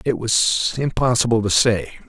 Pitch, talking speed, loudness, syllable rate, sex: 110 Hz, 145 wpm, -18 LUFS, 4.4 syllables/s, male